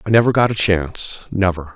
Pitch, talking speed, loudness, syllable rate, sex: 95 Hz, 170 wpm, -17 LUFS, 5.8 syllables/s, male